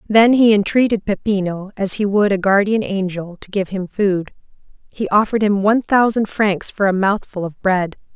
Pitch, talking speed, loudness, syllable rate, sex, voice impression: 200 Hz, 185 wpm, -17 LUFS, 5.0 syllables/s, female, feminine, adult-like, slightly fluent, slightly calm, elegant, slightly sweet